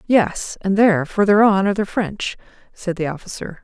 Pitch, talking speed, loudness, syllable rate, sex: 195 Hz, 180 wpm, -18 LUFS, 5.2 syllables/s, female